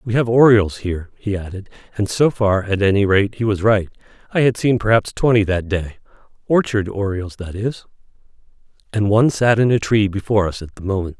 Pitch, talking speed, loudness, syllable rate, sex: 105 Hz, 200 wpm, -18 LUFS, 5.5 syllables/s, male